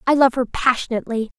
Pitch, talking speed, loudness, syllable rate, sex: 245 Hz, 175 wpm, -19 LUFS, 6.7 syllables/s, female